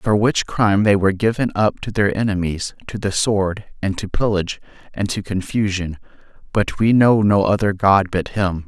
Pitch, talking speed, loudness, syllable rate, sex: 100 Hz, 185 wpm, -19 LUFS, 4.9 syllables/s, male